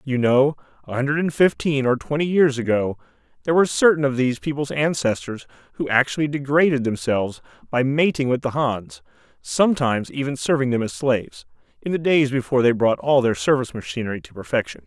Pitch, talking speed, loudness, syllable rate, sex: 130 Hz, 180 wpm, -21 LUFS, 6.1 syllables/s, male